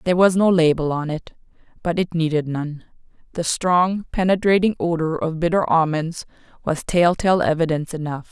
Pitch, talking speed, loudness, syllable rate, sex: 165 Hz, 145 wpm, -20 LUFS, 5.3 syllables/s, female